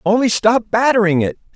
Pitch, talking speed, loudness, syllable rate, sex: 215 Hz, 155 wpm, -15 LUFS, 5.3 syllables/s, male